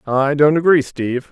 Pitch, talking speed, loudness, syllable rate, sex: 145 Hz, 185 wpm, -15 LUFS, 5.1 syllables/s, male